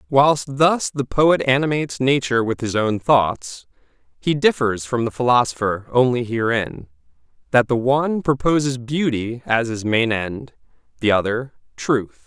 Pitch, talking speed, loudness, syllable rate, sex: 120 Hz, 140 wpm, -19 LUFS, 4.5 syllables/s, male